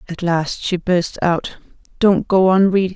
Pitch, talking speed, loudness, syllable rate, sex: 180 Hz, 185 wpm, -17 LUFS, 4.2 syllables/s, female